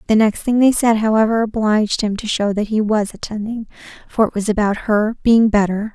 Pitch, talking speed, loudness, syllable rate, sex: 215 Hz, 210 wpm, -17 LUFS, 5.5 syllables/s, female